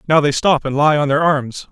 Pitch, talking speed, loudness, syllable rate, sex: 145 Hz, 280 wpm, -15 LUFS, 5.2 syllables/s, male